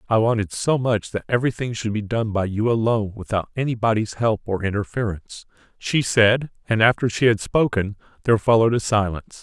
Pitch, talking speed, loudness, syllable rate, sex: 110 Hz, 180 wpm, -21 LUFS, 5.9 syllables/s, male